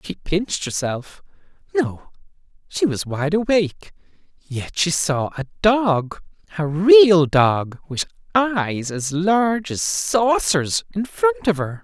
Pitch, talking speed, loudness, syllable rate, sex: 180 Hz, 125 wpm, -19 LUFS, 3.6 syllables/s, male